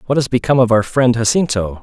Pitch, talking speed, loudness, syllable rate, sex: 120 Hz, 230 wpm, -15 LUFS, 6.6 syllables/s, male